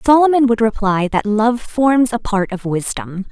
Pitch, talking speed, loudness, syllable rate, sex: 225 Hz, 180 wpm, -16 LUFS, 4.5 syllables/s, female